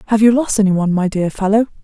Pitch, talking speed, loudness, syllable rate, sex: 205 Hz, 230 wpm, -15 LUFS, 6.8 syllables/s, female